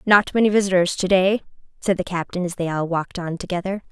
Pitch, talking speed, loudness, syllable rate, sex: 185 Hz, 215 wpm, -21 LUFS, 6.2 syllables/s, female